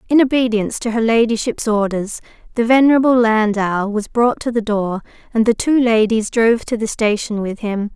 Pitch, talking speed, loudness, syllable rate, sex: 225 Hz, 180 wpm, -16 LUFS, 5.2 syllables/s, female